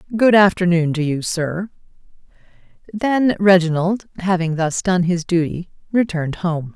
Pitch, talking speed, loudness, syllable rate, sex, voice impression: 180 Hz, 125 wpm, -18 LUFS, 4.6 syllables/s, female, very feminine, very adult-like, slightly clear, intellectual, elegant